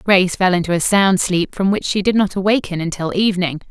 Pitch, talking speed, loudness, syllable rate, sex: 185 Hz, 225 wpm, -17 LUFS, 6.0 syllables/s, female